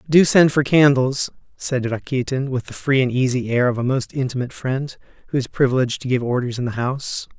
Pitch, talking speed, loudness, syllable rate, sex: 130 Hz, 210 wpm, -20 LUFS, 5.8 syllables/s, male